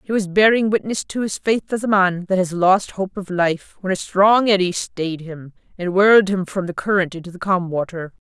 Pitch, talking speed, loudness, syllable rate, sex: 190 Hz, 230 wpm, -19 LUFS, 5.1 syllables/s, female